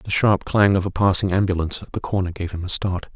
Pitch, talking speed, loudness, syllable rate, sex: 95 Hz, 265 wpm, -21 LUFS, 6.2 syllables/s, male